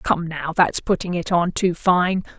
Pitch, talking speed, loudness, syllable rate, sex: 175 Hz, 200 wpm, -20 LUFS, 4.1 syllables/s, female